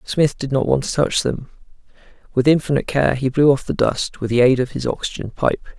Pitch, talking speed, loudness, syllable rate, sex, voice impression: 135 Hz, 230 wpm, -19 LUFS, 5.7 syllables/s, male, masculine, very adult-like, slightly weak, soft, slightly halting, sincere, calm, slightly sweet, kind